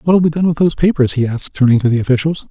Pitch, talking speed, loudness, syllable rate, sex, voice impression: 145 Hz, 285 wpm, -14 LUFS, 7.5 syllables/s, male, masculine, very adult-like, slightly muffled, very fluent, slightly refreshing, sincere, calm, kind